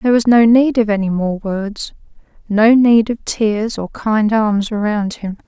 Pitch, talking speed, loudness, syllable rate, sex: 215 Hz, 185 wpm, -15 LUFS, 4.2 syllables/s, female